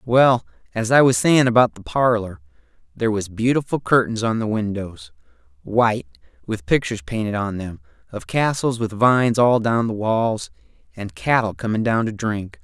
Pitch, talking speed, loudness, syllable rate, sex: 110 Hz, 165 wpm, -20 LUFS, 4.9 syllables/s, male